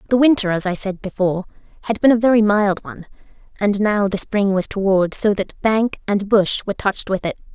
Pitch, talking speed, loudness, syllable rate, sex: 205 Hz, 215 wpm, -18 LUFS, 5.3 syllables/s, female